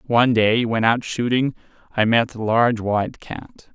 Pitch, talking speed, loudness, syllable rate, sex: 115 Hz, 175 wpm, -19 LUFS, 4.6 syllables/s, male